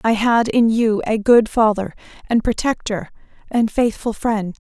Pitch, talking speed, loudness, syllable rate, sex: 225 Hz, 155 wpm, -18 LUFS, 4.2 syllables/s, female